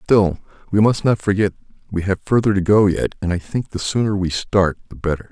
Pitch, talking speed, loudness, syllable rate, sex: 100 Hz, 225 wpm, -19 LUFS, 5.6 syllables/s, male